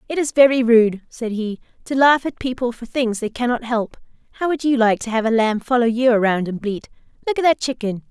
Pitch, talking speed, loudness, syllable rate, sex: 240 Hz, 235 wpm, -19 LUFS, 5.6 syllables/s, female